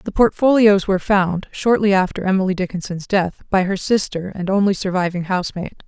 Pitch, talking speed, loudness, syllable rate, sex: 190 Hz, 165 wpm, -18 LUFS, 5.8 syllables/s, female